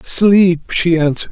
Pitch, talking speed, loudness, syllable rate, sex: 175 Hz, 135 wpm, -12 LUFS, 4.0 syllables/s, male